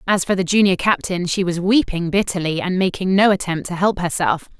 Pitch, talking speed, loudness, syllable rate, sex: 185 Hz, 210 wpm, -18 LUFS, 5.5 syllables/s, female